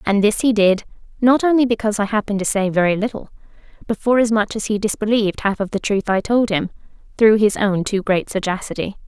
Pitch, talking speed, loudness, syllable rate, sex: 210 Hz, 205 wpm, -18 LUFS, 6.2 syllables/s, female